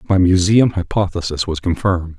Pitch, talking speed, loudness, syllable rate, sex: 90 Hz, 135 wpm, -17 LUFS, 5.5 syllables/s, male